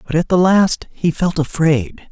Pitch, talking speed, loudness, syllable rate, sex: 160 Hz, 200 wpm, -16 LUFS, 4.3 syllables/s, male